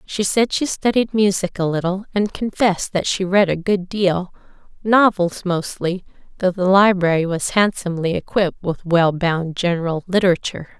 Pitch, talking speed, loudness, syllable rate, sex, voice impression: 185 Hz, 155 wpm, -19 LUFS, 5.0 syllables/s, female, feminine, middle-aged, slightly relaxed, slightly bright, soft, fluent, friendly, reassuring, elegant, kind, slightly modest